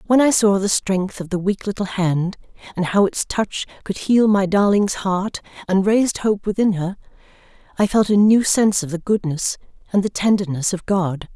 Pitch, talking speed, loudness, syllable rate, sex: 195 Hz, 195 wpm, -19 LUFS, 4.9 syllables/s, female